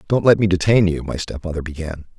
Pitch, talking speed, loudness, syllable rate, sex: 90 Hz, 220 wpm, -19 LUFS, 6.2 syllables/s, male